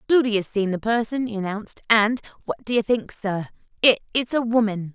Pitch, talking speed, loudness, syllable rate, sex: 220 Hz, 195 wpm, -22 LUFS, 5.3 syllables/s, female